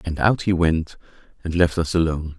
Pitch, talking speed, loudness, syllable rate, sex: 85 Hz, 200 wpm, -21 LUFS, 5.4 syllables/s, male